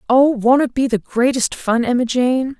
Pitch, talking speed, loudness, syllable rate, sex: 245 Hz, 210 wpm, -16 LUFS, 4.6 syllables/s, female